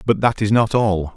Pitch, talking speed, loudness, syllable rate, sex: 105 Hz, 260 wpm, -18 LUFS, 4.9 syllables/s, male